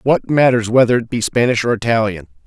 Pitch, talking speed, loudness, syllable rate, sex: 120 Hz, 195 wpm, -15 LUFS, 5.9 syllables/s, male